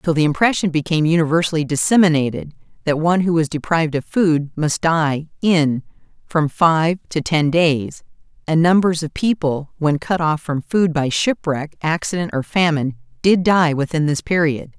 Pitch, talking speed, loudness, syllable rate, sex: 160 Hz, 160 wpm, -18 LUFS, 5.0 syllables/s, female